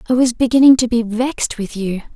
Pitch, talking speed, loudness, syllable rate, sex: 235 Hz, 225 wpm, -15 LUFS, 5.9 syllables/s, female